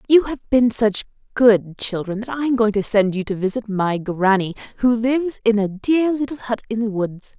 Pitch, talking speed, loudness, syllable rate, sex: 220 Hz, 220 wpm, -19 LUFS, 5.0 syllables/s, female